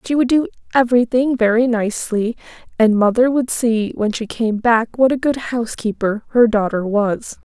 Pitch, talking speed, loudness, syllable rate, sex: 235 Hz, 170 wpm, -17 LUFS, 4.9 syllables/s, female